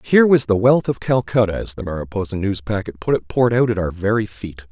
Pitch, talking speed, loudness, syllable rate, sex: 105 Hz, 230 wpm, -19 LUFS, 6.2 syllables/s, male